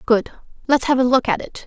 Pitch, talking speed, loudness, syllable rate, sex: 255 Hz, 250 wpm, -18 LUFS, 6.0 syllables/s, female